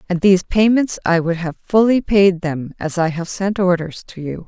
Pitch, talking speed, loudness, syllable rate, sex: 180 Hz, 215 wpm, -17 LUFS, 4.9 syllables/s, female